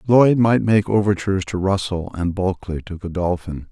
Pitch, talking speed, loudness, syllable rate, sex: 95 Hz, 160 wpm, -19 LUFS, 5.2 syllables/s, male